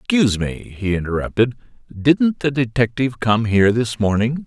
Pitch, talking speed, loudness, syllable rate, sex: 120 Hz, 150 wpm, -19 LUFS, 5.4 syllables/s, male